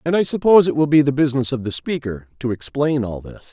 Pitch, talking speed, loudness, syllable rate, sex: 135 Hz, 255 wpm, -18 LUFS, 6.3 syllables/s, male